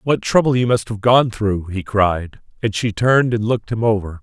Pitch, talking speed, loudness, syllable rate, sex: 110 Hz, 225 wpm, -18 LUFS, 5.1 syllables/s, male